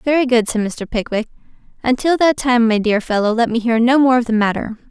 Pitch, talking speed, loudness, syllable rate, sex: 240 Hz, 230 wpm, -16 LUFS, 5.8 syllables/s, female